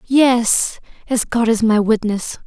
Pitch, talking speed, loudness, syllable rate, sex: 230 Hz, 145 wpm, -16 LUFS, 3.4 syllables/s, female